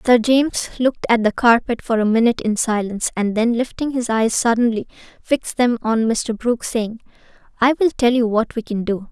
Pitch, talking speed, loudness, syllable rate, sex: 230 Hz, 205 wpm, -18 LUFS, 5.5 syllables/s, female